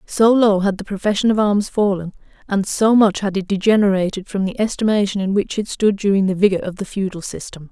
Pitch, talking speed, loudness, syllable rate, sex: 200 Hz, 220 wpm, -18 LUFS, 5.9 syllables/s, female